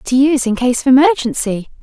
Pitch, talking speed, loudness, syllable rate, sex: 255 Hz, 195 wpm, -14 LUFS, 6.0 syllables/s, female